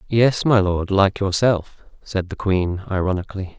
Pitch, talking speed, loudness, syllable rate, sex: 100 Hz, 150 wpm, -20 LUFS, 4.4 syllables/s, male